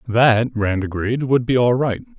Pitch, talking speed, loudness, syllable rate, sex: 120 Hz, 190 wpm, -18 LUFS, 4.3 syllables/s, male